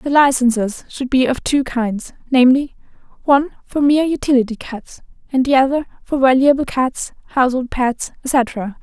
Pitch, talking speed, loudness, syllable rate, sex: 260 Hz, 145 wpm, -17 LUFS, 5.1 syllables/s, female